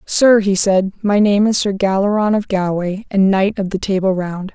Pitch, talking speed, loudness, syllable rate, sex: 195 Hz, 210 wpm, -16 LUFS, 4.6 syllables/s, female